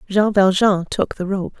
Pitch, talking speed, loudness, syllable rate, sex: 195 Hz, 190 wpm, -18 LUFS, 4.4 syllables/s, female